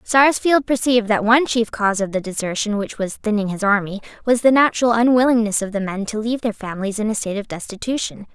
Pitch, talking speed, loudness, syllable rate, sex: 220 Hz, 215 wpm, -19 LUFS, 6.4 syllables/s, female